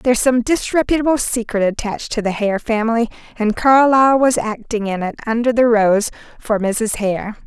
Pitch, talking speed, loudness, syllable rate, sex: 230 Hz, 170 wpm, -17 LUFS, 5.3 syllables/s, female